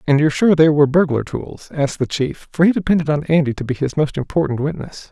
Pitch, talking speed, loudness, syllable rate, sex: 145 Hz, 245 wpm, -17 LUFS, 6.3 syllables/s, male